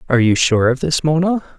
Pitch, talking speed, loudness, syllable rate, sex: 145 Hz, 230 wpm, -16 LUFS, 6.2 syllables/s, male